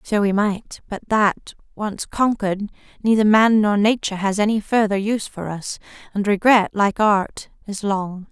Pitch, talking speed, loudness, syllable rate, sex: 205 Hz, 165 wpm, -19 LUFS, 4.6 syllables/s, female